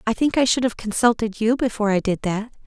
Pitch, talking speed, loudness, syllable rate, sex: 225 Hz, 245 wpm, -21 LUFS, 6.1 syllables/s, female